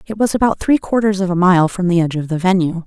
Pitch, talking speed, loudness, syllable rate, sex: 185 Hz, 295 wpm, -15 LUFS, 6.6 syllables/s, female